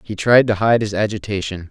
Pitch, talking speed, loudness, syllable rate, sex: 105 Hz, 210 wpm, -17 LUFS, 5.6 syllables/s, male